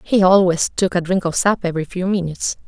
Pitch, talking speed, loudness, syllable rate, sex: 180 Hz, 225 wpm, -18 LUFS, 6.0 syllables/s, female